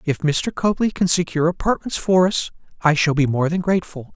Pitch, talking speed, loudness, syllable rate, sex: 170 Hz, 200 wpm, -19 LUFS, 5.7 syllables/s, male